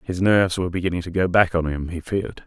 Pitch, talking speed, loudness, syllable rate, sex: 90 Hz, 270 wpm, -21 LUFS, 6.8 syllables/s, male